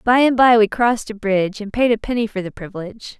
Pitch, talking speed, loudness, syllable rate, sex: 220 Hz, 265 wpm, -17 LUFS, 6.5 syllables/s, female